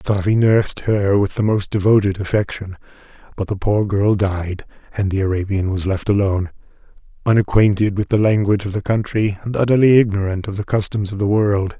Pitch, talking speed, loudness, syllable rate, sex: 100 Hz, 180 wpm, -18 LUFS, 5.6 syllables/s, male